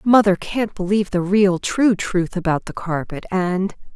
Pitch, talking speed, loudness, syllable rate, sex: 190 Hz, 165 wpm, -20 LUFS, 4.5 syllables/s, female